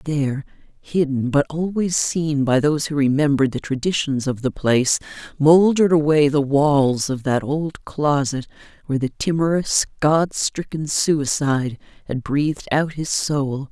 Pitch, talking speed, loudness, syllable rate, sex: 145 Hz, 145 wpm, -20 LUFS, 4.5 syllables/s, female